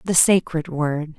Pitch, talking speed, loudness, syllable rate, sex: 165 Hz, 150 wpm, -19 LUFS, 3.9 syllables/s, female